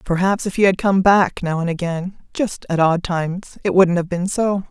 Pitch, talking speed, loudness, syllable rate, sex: 180 Hz, 230 wpm, -18 LUFS, 4.8 syllables/s, female